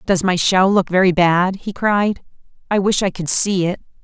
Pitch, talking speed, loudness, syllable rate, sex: 185 Hz, 210 wpm, -17 LUFS, 4.6 syllables/s, female